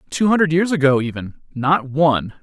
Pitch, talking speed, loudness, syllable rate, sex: 155 Hz, 150 wpm, -17 LUFS, 5.4 syllables/s, male